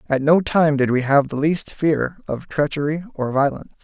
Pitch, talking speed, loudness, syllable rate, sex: 150 Hz, 205 wpm, -20 LUFS, 4.9 syllables/s, male